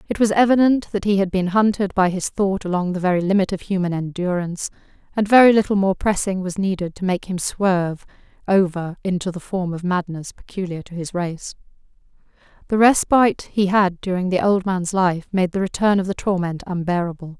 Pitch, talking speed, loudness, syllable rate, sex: 185 Hz, 190 wpm, -20 LUFS, 5.5 syllables/s, female